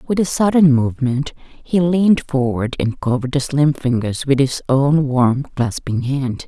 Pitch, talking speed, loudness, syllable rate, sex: 140 Hz, 165 wpm, -17 LUFS, 4.4 syllables/s, female